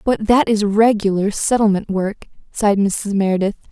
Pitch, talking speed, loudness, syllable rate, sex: 205 Hz, 145 wpm, -17 LUFS, 5.0 syllables/s, female